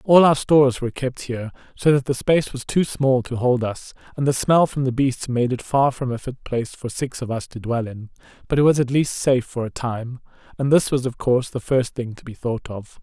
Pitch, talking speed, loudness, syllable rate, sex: 130 Hz, 265 wpm, -21 LUFS, 5.5 syllables/s, male